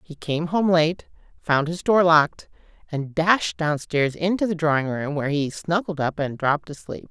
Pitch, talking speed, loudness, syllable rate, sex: 160 Hz, 185 wpm, -22 LUFS, 4.7 syllables/s, female